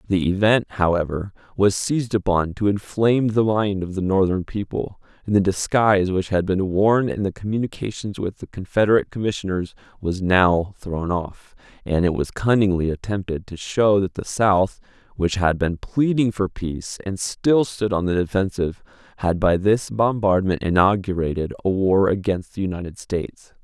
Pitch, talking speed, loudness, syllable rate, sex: 95 Hz, 165 wpm, -21 LUFS, 5.0 syllables/s, male